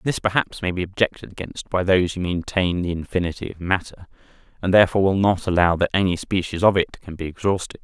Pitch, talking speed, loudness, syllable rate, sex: 90 Hz, 205 wpm, -21 LUFS, 6.3 syllables/s, male